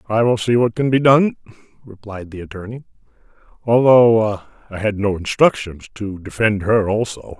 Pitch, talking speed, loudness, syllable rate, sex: 110 Hz, 155 wpm, -16 LUFS, 4.9 syllables/s, male